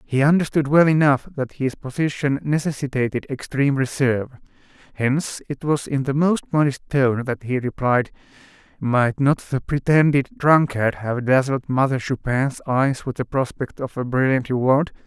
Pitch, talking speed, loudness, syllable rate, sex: 135 Hz, 150 wpm, -21 LUFS, 4.8 syllables/s, male